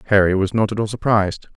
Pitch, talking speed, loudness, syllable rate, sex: 105 Hz, 230 wpm, -19 LUFS, 7.0 syllables/s, male